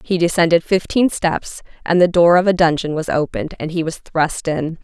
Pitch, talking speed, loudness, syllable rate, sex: 170 Hz, 210 wpm, -17 LUFS, 5.1 syllables/s, female